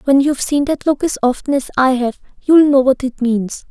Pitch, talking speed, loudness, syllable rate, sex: 270 Hz, 245 wpm, -15 LUFS, 5.3 syllables/s, female